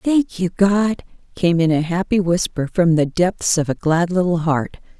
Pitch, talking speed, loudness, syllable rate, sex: 175 Hz, 190 wpm, -18 LUFS, 4.3 syllables/s, female